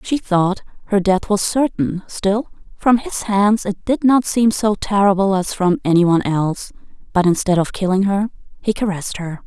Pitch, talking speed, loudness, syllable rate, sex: 200 Hz, 175 wpm, -17 LUFS, 5.0 syllables/s, female